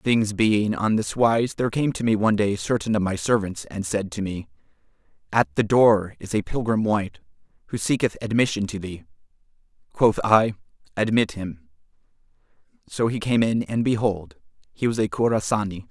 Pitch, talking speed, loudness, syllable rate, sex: 105 Hz, 170 wpm, -23 LUFS, 5.0 syllables/s, male